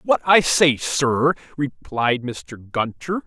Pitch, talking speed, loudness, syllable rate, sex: 140 Hz, 130 wpm, -20 LUFS, 3.0 syllables/s, male